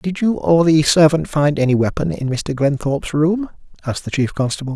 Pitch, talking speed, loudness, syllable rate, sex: 150 Hz, 200 wpm, -17 LUFS, 5.4 syllables/s, male